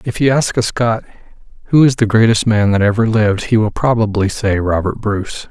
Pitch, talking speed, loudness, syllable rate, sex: 110 Hz, 205 wpm, -14 LUFS, 5.5 syllables/s, male